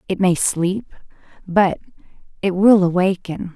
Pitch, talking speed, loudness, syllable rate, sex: 185 Hz, 120 wpm, -18 LUFS, 3.9 syllables/s, female